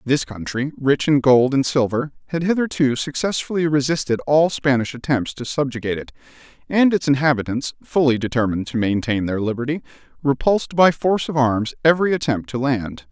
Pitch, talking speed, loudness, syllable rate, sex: 135 Hz, 160 wpm, -20 LUFS, 5.6 syllables/s, male